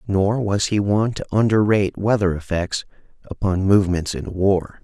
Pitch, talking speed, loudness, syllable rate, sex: 100 Hz, 150 wpm, -20 LUFS, 5.0 syllables/s, male